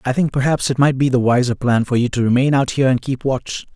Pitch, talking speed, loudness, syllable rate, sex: 130 Hz, 290 wpm, -17 LUFS, 6.2 syllables/s, male